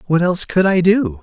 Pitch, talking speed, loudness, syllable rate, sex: 170 Hz, 245 wpm, -15 LUFS, 5.6 syllables/s, male